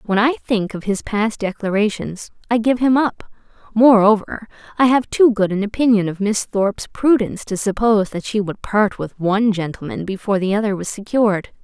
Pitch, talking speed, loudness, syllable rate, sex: 210 Hz, 185 wpm, -18 LUFS, 5.3 syllables/s, female